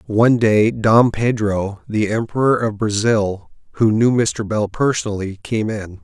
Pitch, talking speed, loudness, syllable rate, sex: 110 Hz, 150 wpm, -17 LUFS, 4.2 syllables/s, male